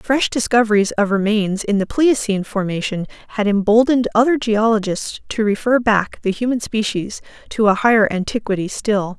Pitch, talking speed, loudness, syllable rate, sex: 215 Hz, 150 wpm, -17 LUFS, 5.2 syllables/s, female